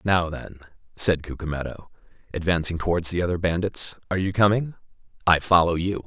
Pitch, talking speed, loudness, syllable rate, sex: 85 Hz, 140 wpm, -23 LUFS, 5.9 syllables/s, male